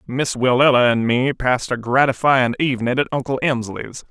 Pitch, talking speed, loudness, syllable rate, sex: 125 Hz, 160 wpm, -18 LUFS, 5.2 syllables/s, male